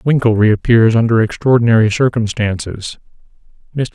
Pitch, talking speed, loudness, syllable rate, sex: 115 Hz, 75 wpm, -13 LUFS, 5.3 syllables/s, male